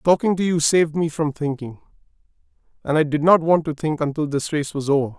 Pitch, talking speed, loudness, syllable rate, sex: 155 Hz, 220 wpm, -20 LUFS, 5.9 syllables/s, male